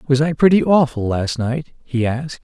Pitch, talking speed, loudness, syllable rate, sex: 140 Hz, 195 wpm, -17 LUFS, 5.1 syllables/s, male